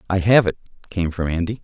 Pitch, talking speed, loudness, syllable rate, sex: 95 Hz, 220 wpm, -19 LUFS, 6.3 syllables/s, male